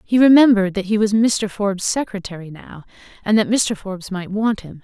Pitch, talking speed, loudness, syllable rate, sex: 205 Hz, 200 wpm, -17 LUFS, 5.5 syllables/s, female